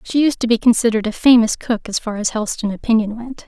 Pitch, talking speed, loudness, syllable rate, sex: 225 Hz, 240 wpm, -17 LUFS, 6.5 syllables/s, female